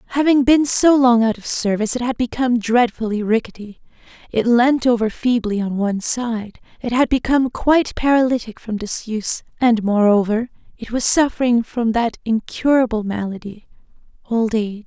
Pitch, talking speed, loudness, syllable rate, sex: 235 Hz, 145 wpm, -18 LUFS, 5.2 syllables/s, female